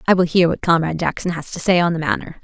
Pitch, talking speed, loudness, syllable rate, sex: 165 Hz, 295 wpm, -18 LUFS, 7.1 syllables/s, female